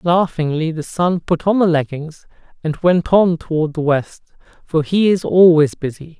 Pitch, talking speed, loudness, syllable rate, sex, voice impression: 165 Hz, 175 wpm, -16 LUFS, 4.5 syllables/s, male, very masculine, slightly middle-aged, slightly thick, slightly relaxed, slightly weak, slightly bright, soft, clear, fluent, slightly cool, intellectual, slightly refreshing, sincere, calm, slightly friendly, slightly reassuring, unique, slightly elegant, slightly sweet, slightly lively, kind, modest, slightly light